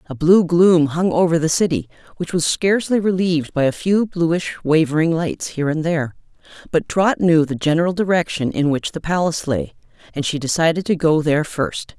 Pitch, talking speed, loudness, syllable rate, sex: 165 Hz, 190 wpm, -18 LUFS, 5.4 syllables/s, female